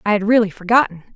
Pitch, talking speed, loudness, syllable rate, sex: 210 Hz, 210 wpm, -16 LUFS, 7.2 syllables/s, female